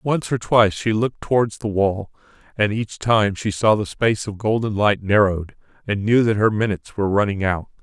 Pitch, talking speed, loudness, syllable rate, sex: 105 Hz, 205 wpm, -20 LUFS, 5.5 syllables/s, male